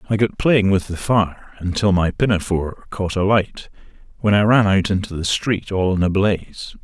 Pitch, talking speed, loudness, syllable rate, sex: 100 Hz, 195 wpm, -19 LUFS, 4.8 syllables/s, male